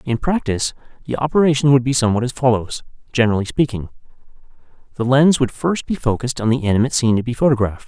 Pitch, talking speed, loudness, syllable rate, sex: 125 Hz, 185 wpm, -18 LUFS, 7.3 syllables/s, male